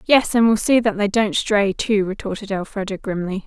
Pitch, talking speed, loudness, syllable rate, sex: 205 Hz, 210 wpm, -19 LUFS, 5.0 syllables/s, female